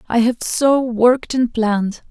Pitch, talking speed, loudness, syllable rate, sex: 235 Hz, 170 wpm, -17 LUFS, 4.4 syllables/s, female